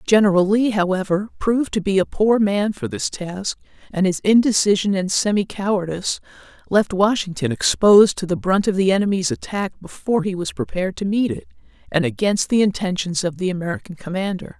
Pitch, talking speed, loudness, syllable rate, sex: 195 Hz, 175 wpm, -19 LUFS, 5.7 syllables/s, female